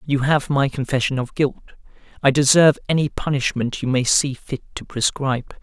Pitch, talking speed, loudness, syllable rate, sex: 135 Hz, 170 wpm, -19 LUFS, 5.3 syllables/s, male